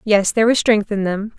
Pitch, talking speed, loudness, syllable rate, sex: 210 Hz, 260 wpm, -17 LUFS, 5.5 syllables/s, female